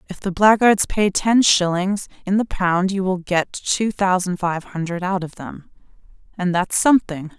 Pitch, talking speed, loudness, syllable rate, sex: 185 Hz, 180 wpm, -19 LUFS, 4.4 syllables/s, female